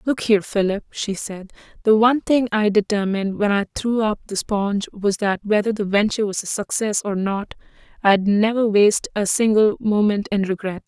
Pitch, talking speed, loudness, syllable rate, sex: 210 Hz, 190 wpm, -20 LUFS, 5.3 syllables/s, female